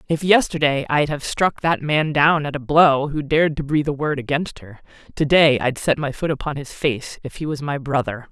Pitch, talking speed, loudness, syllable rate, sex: 145 Hz, 240 wpm, -19 LUFS, 5.2 syllables/s, female